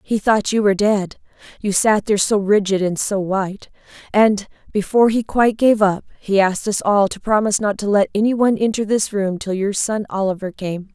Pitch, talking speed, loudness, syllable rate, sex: 205 Hz, 210 wpm, -18 LUFS, 5.6 syllables/s, female